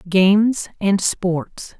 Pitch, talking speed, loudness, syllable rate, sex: 195 Hz, 100 wpm, -18 LUFS, 2.7 syllables/s, female